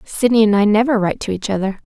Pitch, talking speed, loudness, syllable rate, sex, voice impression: 210 Hz, 255 wpm, -16 LUFS, 7.0 syllables/s, female, very feminine, slightly adult-like, very thin, very tensed, powerful, very bright, very hard, very clear, very fluent, slightly raspy, very cute, intellectual, very refreshing, slightly sincere, slightly calm, friendly, reassuring, unique, elegant, slightly wild, sweet, very lively, slightly strict, intense, slightly sharp, light